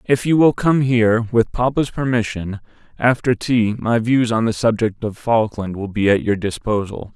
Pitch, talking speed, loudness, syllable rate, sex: 115 Hz, 170 wpm, -18 LUFS, 4.7 syllables/s, male